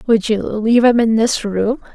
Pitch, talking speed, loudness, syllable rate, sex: 225 Hz, 215 wpm, -15 LUFS, 4.7 syllables/s, female